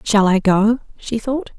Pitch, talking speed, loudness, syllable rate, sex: 220 Hz, 190 wpm, -17 LUFS, 3.8 syllables/s, female